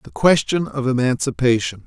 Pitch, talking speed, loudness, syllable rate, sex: 135 Hz, 130 wpm, -19 LUFS, 5.1 syllables/s, male